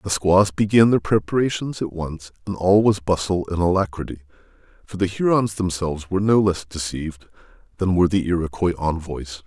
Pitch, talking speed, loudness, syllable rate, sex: 90 Hz, 165 wpm, -21 LUFS, 5.5 syllables/s, male